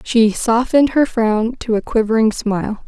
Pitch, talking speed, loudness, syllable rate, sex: 230 Hz, 165 wpm, -16 LUFS, 4.7 syllables/s, female